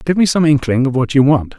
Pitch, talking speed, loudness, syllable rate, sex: 145 Hz, 305 wpm, -14 LUFS, 6.1 syllables/s, male